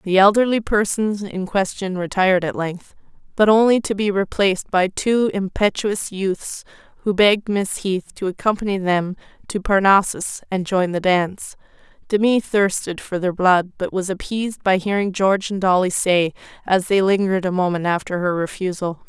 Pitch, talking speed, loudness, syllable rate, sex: 190 Hz, 165 wpm, -19 LUFS, 4.9 syllables/s, female